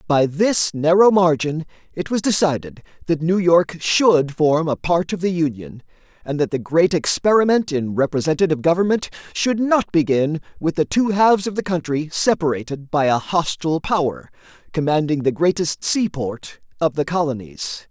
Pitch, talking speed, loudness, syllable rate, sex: 165 Hz, 160 wpm, -19 LUFS, 4.9 syllables/s, male